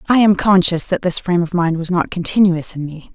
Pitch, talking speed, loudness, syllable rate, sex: 175 Hz, 250 wpm, -16 LUFS, 5.7 syllables/s, female